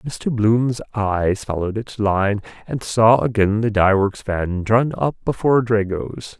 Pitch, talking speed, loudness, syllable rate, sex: 110 Hz, 150 wpm, -19 LUFS, 3.9 syllables/s, male